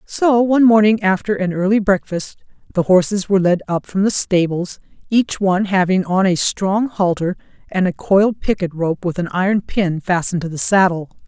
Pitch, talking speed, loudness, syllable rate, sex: 190 Hz, 185 wpm, -17 LUFS, 5.2 syllables/s, female